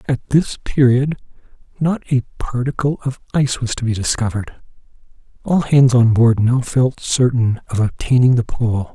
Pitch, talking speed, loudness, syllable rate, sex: 125 Hz, 155 wpm, -17 LUFS, 4.7 syllables/s, male